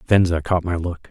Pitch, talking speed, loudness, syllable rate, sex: 85 Hz, 215 wpm, -20 LUFS, 5.4 syllables/s, male